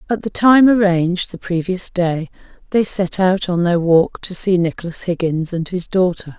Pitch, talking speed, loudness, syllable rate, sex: 180 Hz, 190 wpm, -17 LUFS, 4.7 syllables/s, female